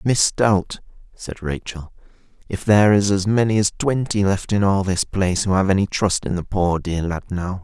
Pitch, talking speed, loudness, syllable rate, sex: 95 Hz, 205 wpm, -19 LUFS, 5.0 syllables/s, male